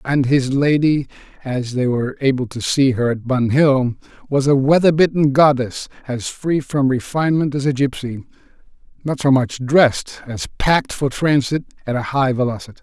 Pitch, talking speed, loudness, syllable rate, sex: 135 Hz, 170 wpm, -18 LUFS, 5.0 syllables/s, male